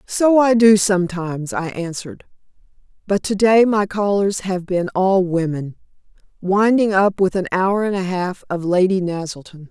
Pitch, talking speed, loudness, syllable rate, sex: 190 Hz, 160 wpm, -18 LUFS, 4.6 syllables/s, female